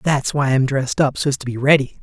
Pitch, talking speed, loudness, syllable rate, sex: 135 Hz, 325 wpm, -18 LUFS, 6.8 syllables/s, male